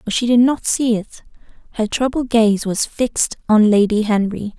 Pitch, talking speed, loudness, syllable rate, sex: 225 Hz, 185 wpm, -17 LUFS, 5.0 syllables/s, female